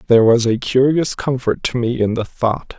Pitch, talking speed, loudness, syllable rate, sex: 120 Hz, 215 wpm, -17 LUFS, 5.0 syllables/s, male